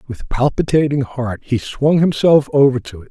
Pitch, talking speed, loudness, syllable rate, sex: 135 Hz, 175 wpm, -16 LUFS, 4.8 syllables/s, male